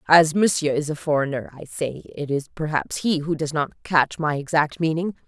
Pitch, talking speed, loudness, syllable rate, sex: 155 Hz, 205 wpm, -23 LUFS, 5.0 syllables/s, female